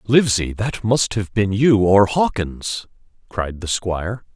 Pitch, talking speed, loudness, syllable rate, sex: 105 Hz, 150 wpm, -19 LUFS, 4.0 syllables/s, male